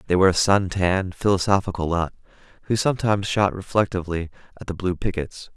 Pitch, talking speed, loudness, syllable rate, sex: 95 Hz, 160 wpm, -22 LUFS, 6.5 syllables/s, male